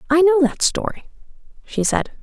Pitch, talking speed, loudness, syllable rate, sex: 305 Hz, 160 wpm, -19 LUFS, 4.8 syllables/s, female